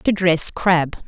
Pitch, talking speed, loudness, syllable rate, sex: 175 Hz, 165 wpm, -17 LUFS, 3.0 syllables/s, female